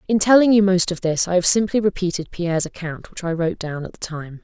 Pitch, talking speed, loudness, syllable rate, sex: 180 Hz, 255 wpm, -19 LUFS, 6.1 syllables/s, female